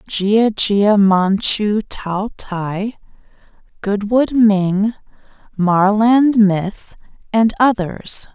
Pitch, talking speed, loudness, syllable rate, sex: 205 Hz, 80 wpm, -15 LUFS, 2.4 syllables/s, female